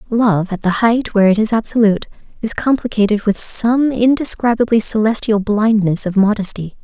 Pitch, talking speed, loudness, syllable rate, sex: 215 Hz, 150 wpm, -15 LUFS, 5.3 syllables/s, female